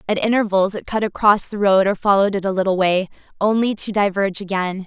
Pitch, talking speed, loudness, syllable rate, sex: 200 Hz, 210 wpm, -18 LUFS, 6.2 syllables/s, female